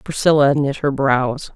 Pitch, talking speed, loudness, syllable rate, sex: 140 Hz, 155 wpm, -17 LUFS, 4.1 syllables/s, female